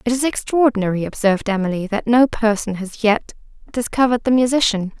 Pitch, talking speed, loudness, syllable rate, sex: 225 Hz, 155 wpm, -18 LUFS, 6.0 syllables/s, female